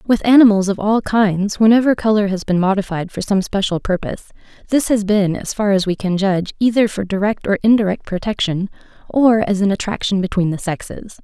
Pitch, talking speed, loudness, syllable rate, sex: 200 Hz, 190 wpm, -16 LUFS, 5.6 syllables/s, female